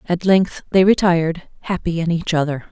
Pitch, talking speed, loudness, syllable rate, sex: 175 Hz, 175 wpm, -18 LUFS, 5.2 syllables/s, female